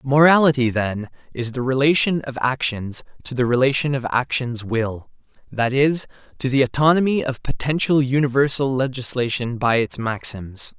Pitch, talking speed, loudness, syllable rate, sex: 130 Hz, 140 wpm, -20 LUFS, 4.8 syllables/s, male